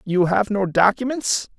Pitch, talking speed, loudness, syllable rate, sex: 190 Hz, 150 wpm, -19 LUFS, 4.3 syllables/s, male